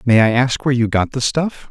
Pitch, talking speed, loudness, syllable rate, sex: 125 Hz, 280 wpm, -16 LUFS, 5.6 syllables/s, male